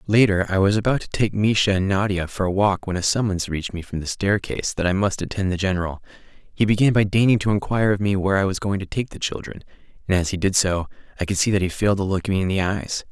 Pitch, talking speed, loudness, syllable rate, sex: 100 Hz, 270 wpm, -21 LUFS, 6.5 syllables/s, male